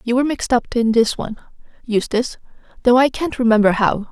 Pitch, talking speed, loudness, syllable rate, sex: 235 Hz, 190 wpm, -17 LUFS, 6.5 syllables/s, female